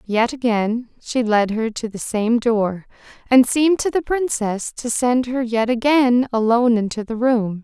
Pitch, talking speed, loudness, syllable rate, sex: 235 Hz, 180 wpm, -19 LUFS, 4.3 syllables/s, female